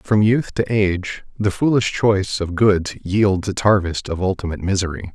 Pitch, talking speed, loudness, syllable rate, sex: 95 Hz, 175 wpm, -19 LUFS, 4.9 syllables/s, male